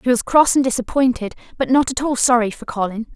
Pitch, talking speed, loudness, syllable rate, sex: 245 Hz, 230 wpm, -18 LUFS, 6.2 syllables/s, female